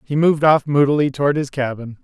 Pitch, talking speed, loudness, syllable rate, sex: 140 Hz, 205 wpm, -17 LUFS, 6.3 syllables/s, male